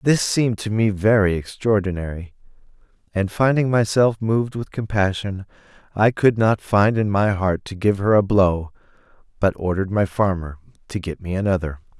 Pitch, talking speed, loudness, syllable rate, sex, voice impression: 100 Hz, 160 wpm, -20 LUFS, 5.1 syllables/s, male, very masculine, very adult-like, slightly old, very thick, tensed, very powerful, slightly dark, slightly soft, very clear, fluent, very cool, intellectual, slightly refreshing, sincere, very calm, very mature, very friendly, reassuring, unique, slightly elegant, very wild, sweet, lively, kind, slightly intense